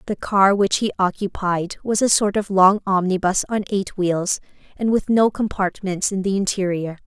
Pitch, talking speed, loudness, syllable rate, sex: 195 Hz, 180 wpm, -20 LUFS, 4.7 syllables/s, female